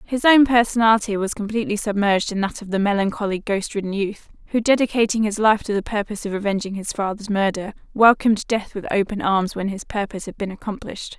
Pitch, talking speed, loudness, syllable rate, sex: 210 Hz, 200 wpm, -20 LUFS, 6.3 syllables/s, female